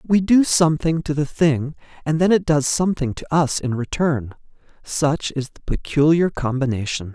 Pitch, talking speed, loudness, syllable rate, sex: 150 Hz, 170 wpm, -20 LUFS, 4.8 syllables/s, male